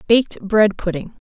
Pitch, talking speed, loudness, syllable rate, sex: 205 Hz, 140 wpm, -18 LUFS, 4.9 syllables/s, female